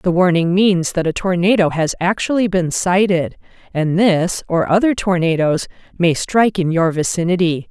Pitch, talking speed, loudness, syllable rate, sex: 180 Hz, 155 wpm, -16 LUFS, 4.3 syllables/s, female